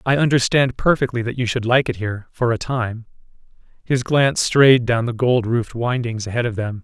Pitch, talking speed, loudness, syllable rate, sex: 120 Hz, 195 wpm, -19 LUFS, 5.4 syllables/s, male